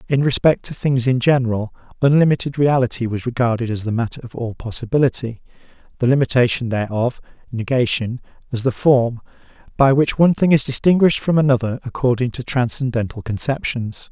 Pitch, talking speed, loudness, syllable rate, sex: 125 Hz, 150 wpm, -18 LUFS, 5.9 syllables/s, male